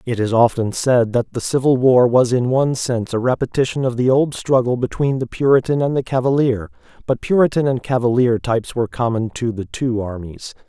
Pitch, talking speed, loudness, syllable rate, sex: 125 Hz, 195 wpm, -18 LUFS, 5.6 syllables/s, male